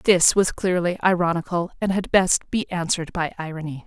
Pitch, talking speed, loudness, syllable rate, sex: 175 Hz, 170 wpm, -22 LUFS, 5.2 syllables/s, female